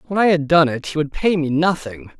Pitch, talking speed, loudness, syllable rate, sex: 160 Hz, 275 wpm, -18 LUFS, 5.6 syllables/s, male